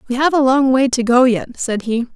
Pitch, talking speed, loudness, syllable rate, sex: 250 Hz, 280 wpm, -15 LUFS, 5.1 syllables/s, female